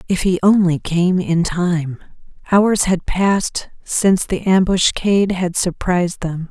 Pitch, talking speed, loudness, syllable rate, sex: 185 Hz, 140 wpm, -17 LUFS, 4.1 syllables/s, female